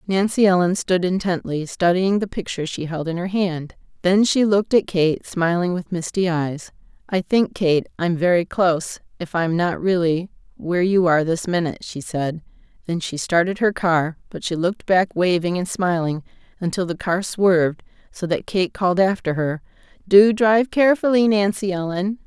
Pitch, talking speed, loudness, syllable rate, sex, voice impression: 180 Hz, 180 wpm, -20 LUFS, 5.0 syllables/s, female, feminine, adult-like, tensed, powerful, clear, fluent, calm, elegant, lively, strict, slightly intense, sharp